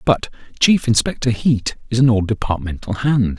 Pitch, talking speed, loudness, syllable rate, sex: 115 Hz, 160 wpm, -18 LUFS, 4.9 syllables/s, male